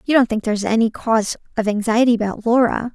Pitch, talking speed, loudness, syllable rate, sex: 225 Hz, 225 wpm, -18 LUFS, 6.8 syllables/s, female